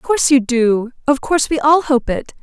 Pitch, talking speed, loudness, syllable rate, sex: 270 Hz, 245 wpm, -15 LUFS, 5.5 syllables/s, female